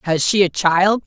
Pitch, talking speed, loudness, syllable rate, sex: 185 Hz, 225 wpm, -16 LUFS, 4.4 syllables/s, female